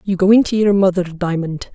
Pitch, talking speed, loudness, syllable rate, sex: 185 Hz, 240 wpm, -16 LUFS, 5.5 syllables/s, female